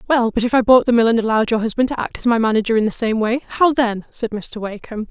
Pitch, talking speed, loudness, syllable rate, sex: 230 Hz, 295 wpm, -17 LUFS, 6.7 syllables/s, female